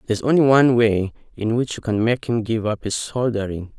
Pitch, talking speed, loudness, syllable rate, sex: 115 Hz, 240 wpm, -20 LUFS, 5.9 syllables/s, male